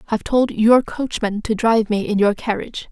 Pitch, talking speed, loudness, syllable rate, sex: 220 Hz, 205 wpm, -18 LUFS, 5.6 syllables/s, female